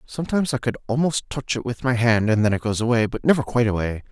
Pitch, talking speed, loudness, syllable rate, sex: 120 Hz, 260 wpm, -21 LUFS, 6.8 syllables/s, male